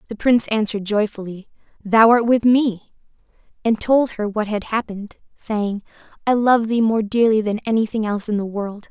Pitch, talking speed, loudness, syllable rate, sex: 215 Hz, 175 wpm, -19 LUFS, 5.2 syllables/s, female